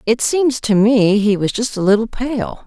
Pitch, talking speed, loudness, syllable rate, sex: 220 Hz, 225 wpm, -16 LUFS, 4.8 syllables/s, female